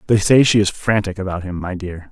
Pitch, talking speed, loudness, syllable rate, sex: 95 Hz, 255 wpm, -17 LUFS, 5.7 syllables/s, male